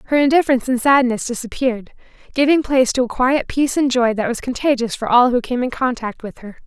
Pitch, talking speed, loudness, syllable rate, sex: 250 Hz, 215 wpm, -17 LUFS, 6.3 syllables/s, female